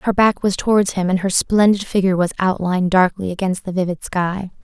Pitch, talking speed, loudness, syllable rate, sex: 190 Hz, 205 wpm, -18 LUFS, 5.7 syllables/s, female